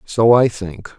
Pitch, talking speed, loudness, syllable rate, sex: 110 Hz, 185 wpm, -14 LUFS, 3.7 syllables/s, male